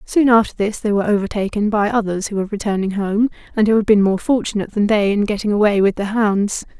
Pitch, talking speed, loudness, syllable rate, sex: 210 Hz, 230 wpm, -17 LUFS, 6.4 syllables/s, female